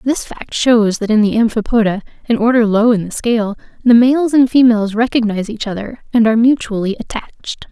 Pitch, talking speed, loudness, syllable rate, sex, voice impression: 225 Hz, 185 wpm, -14 LUFS, 6.2 syllables/s, female, feminine, adult-like, slightly weak, soft, fluent, slightly raspy, slightly cute, intellectual, friendly, reassuring, slightly elegant, slightly sharp, slightly modest